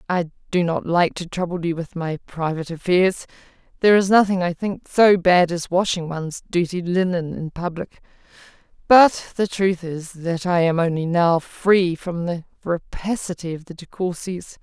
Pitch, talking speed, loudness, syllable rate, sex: 175 Hz, 165 wpm, -20 LUFS, 4.7 syllables/s, female